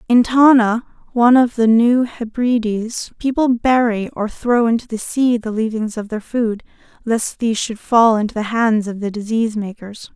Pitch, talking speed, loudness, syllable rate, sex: 230 Hz, 175 wpm, -17 LUFS, 4.7 syllables/s, female